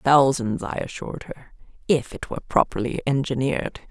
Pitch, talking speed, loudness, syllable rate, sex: 130 Hz, 140 wpm, -24 LUFS, 5.4 syllables/s, female